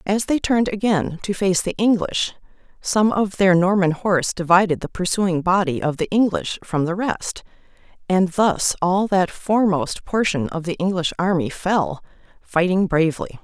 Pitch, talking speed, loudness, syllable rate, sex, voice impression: 185 Hz, 160 wpm, -20 LUFS, 4.7 syllables/s, female, feminine, adult-like, tensed, powerful, slightly hard, clear, fluent, intellectual, calm, elegant, lively, strict, sharp